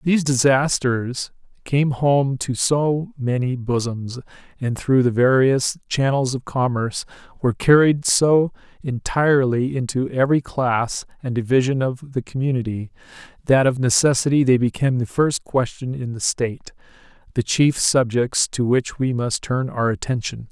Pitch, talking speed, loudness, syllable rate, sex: 130 Hz, 140 wpm, -20 LUFS, 4.6 syllables/s, male